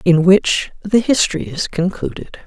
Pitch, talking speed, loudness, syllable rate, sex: 185 Hz, 145 wpm, -16 LUFS, 4.6 syllables/s, female